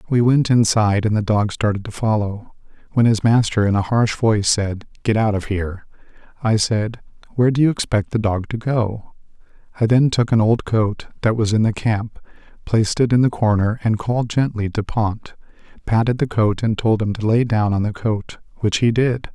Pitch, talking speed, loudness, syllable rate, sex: 110 Hz, 210 wpm, -19 LUFS, 5.2 syllables/s, male